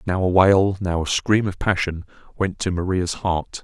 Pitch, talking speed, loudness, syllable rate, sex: 95 Hz, 200 wpm, -21 LUFS, 4.5 syllables/s, male